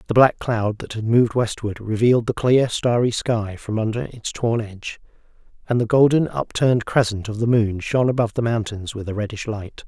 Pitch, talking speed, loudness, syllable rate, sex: 115 Hz, 200 wpm, -21 LUFS, 5.5 syllables/s, male